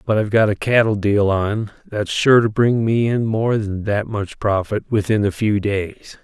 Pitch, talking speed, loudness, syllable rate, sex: 105 Hz, 210 wpm, -18 LUFS, 4.4 syllables/s, male